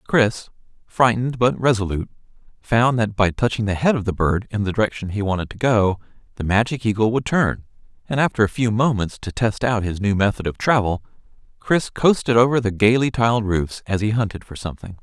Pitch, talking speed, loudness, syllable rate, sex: 110 Hz, 200 wpm, -20 LUFS, 5.7 syllables/s, male